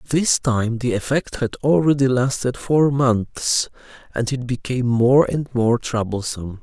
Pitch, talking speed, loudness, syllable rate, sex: 125 Hz, 145 wpm, -20 LUFS, 4.3 syllables/s, male